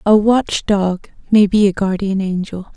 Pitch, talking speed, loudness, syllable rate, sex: 200 Hz, 175 wpm, -16 LUFS, 4.2 syllables/s, female